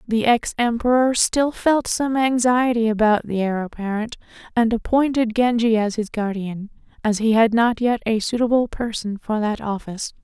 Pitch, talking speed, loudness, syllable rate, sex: 230 Hz, 165 wpm, -20 LUFS, 4.8 syllables/s, female